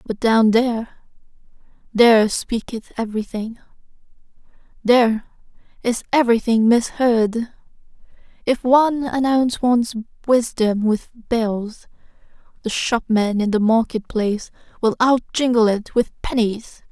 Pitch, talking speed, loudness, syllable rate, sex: 230 Hz, 100 wpm, -19 LUFS, 4.4 syllables/s, female